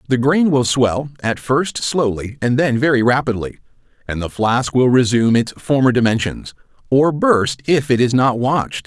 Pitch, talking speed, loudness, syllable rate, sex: 125 Hz, 175 wpm, -16 LUFS, 4.7 syllables/s, male